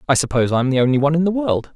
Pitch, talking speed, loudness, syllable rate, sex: 145 Hz, 340 wpm, -17 LUFS, 8.8 syllables/s, male